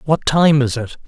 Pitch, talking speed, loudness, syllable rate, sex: 140 Hz, 225 wpm, -16 LUFS, 4.8 syllables/s, male